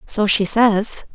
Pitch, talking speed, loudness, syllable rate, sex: 210 Hz, 155 wpm, -15 LUFS, 3.3 syllables/s, female